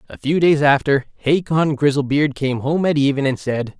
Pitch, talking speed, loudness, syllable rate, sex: 145 Hz, 190 wpm, -18 LUFS, 4.8 syllables/s, male